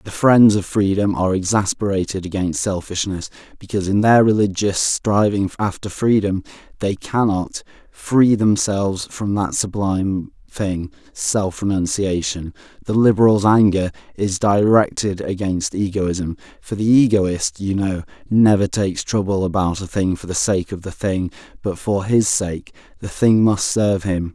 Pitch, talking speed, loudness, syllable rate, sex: 100 Hz, 140 wpm, -18 LUFS, 4.5 syllables/s, male